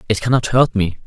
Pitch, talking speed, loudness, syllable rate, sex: 110 Hz, 225 wpm, -16 LUFS, 6.0 syllables/s, male